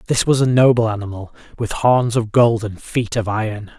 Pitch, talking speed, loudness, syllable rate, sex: 115 Hz, 205 wpm, -17 LUFS, 5.2 syllables/s, male